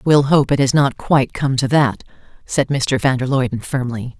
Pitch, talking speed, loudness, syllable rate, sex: 130 Hz, 215 wpm, -17 LUFS, 4.9 syllables/s, female